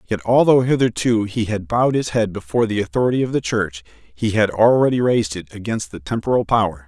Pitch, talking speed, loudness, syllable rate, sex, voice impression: 110 Hz, 200 wpm, -19 LUFS, 5.9 syllables/s, male, masculine, adult-like, tensed, powerful, soft, clear, cool, calm, slightly mature, friendly, wild, lively, slightly kind